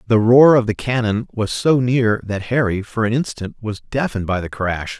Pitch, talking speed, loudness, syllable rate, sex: 115 Hz, 215 wpm, -18 LUFS, 5.0 syllables/s, male